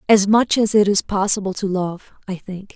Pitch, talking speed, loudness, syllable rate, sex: 200 Hz, 220 wpm, -18 LUFS, 5.0 syllables/s, female